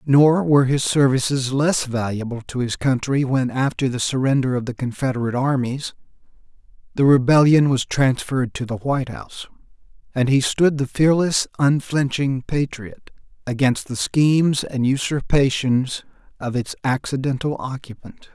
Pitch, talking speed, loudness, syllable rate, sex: 135 Hz, 135 wpm, -20 LUFS, 4.8 syllables/s, male